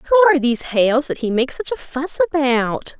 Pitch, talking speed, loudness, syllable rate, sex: 270 Hz, 220 wpm, -18 LUFS, 6.8 syllables/s, female